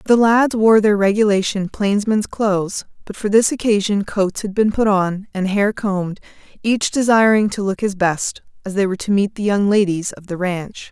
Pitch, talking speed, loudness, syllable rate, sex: 200 Hz, 200 wpm, -17 LUFS, 4.9 syllables/s, female